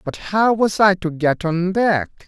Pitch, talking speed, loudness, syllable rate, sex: 180 Hz, 210 wpm, -18 LUFS, 3.9 syllables/s, male